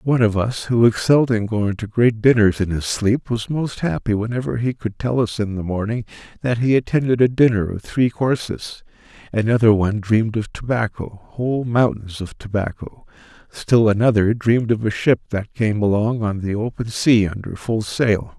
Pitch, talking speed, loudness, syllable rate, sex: 110 Hz, 185 wpm, -19 LUFS, 5.0 syllables/s, male